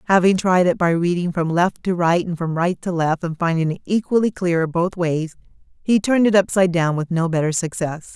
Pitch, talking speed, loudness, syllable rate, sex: 175 Hz, 220 wpm, -19 LUFS, 5.4 syllables/s, female